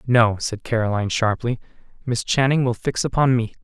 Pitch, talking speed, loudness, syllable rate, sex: 120 Hz, 165 wpm, -21 LUFS, 5.5 syllables/s, male